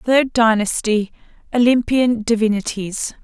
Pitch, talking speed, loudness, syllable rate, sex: 230 Hz, 55 wpm, -17 LUFS, 4.1 syllables/s, female